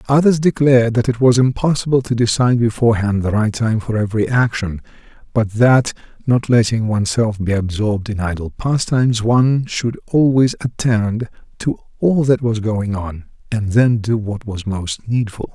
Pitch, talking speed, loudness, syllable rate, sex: 115 Hz, 160 wpm, -17 LUFS, 5.0 syllables/s, male